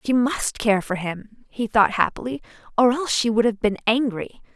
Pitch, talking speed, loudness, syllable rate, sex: 230 Hz, 200 wpm, -21 LUFS, 5.0 syllables/s, female